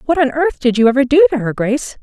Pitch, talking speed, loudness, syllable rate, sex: 270 Hz, 295 wpm, -14 LUFS, 6.7 syllables/s, female